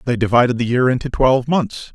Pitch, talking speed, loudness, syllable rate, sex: 125 Hz, 215 wpm, -16 LUFS, 6.1 syllables/s, male